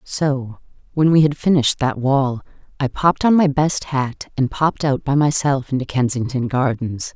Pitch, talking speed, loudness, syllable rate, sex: 135 Hz, 175 wpm, -18 LUFS, 4.8 syllables/s, female